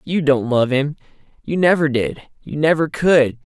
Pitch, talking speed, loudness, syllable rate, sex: 145 Hz, 135 wpm, -17 LUFS, 4.5 syllables/s, male